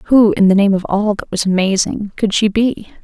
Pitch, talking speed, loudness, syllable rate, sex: 205 Hz, 240 wpm, -15 LUFS, 5.0 syllables/s, female